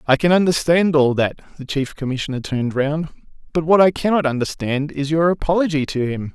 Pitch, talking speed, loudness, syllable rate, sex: 150 Hz, 170 wpm, -19 LUFS, 5.8 syllables/s, male